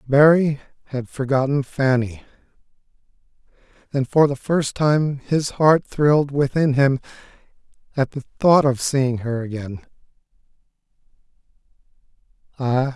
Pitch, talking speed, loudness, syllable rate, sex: 135 Hz, 95 wpm, -20 LUFS, 4.3 syllables/s, male